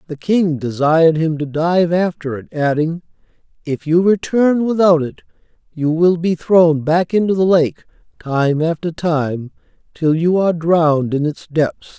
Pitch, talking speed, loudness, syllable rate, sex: 165 Hz, 160 wpm, -16 LUFS, 4.3 syllables/s, male